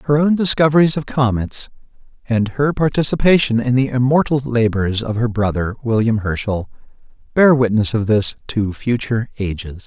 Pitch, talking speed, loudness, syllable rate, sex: 120 Hz, 145 wpm, -17 LUFS, 5.1 syllables/s, male